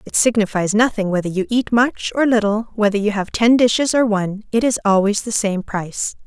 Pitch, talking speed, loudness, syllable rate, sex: 215 Hz, 190 wpm, -17 LUFS, 5.5 syllables/s, female